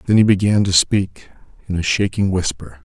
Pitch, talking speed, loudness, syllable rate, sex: 95 Hz, 185 wpm, -17 LUFS, 5.2 syllables/s, male